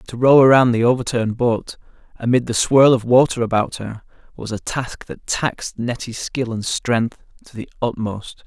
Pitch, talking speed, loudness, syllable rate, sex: 120 Hz, 175 wpm, -18 LUFS, 4.8 syllables/s, male